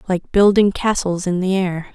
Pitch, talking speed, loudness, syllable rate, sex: 185 Hz, 185 wpm, -17 LUFS, 4.5 syllables/s, female